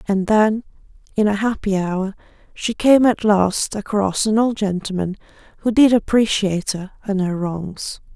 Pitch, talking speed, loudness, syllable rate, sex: 205 Hz, 155 wpm, -19 LUFS, 4.4 syllables/s, female